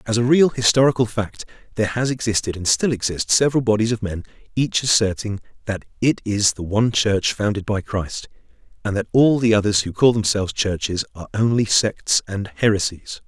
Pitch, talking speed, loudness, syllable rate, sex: 110 Hz, 180 wpm, -19 LUFS, 5.6 syllables/s, male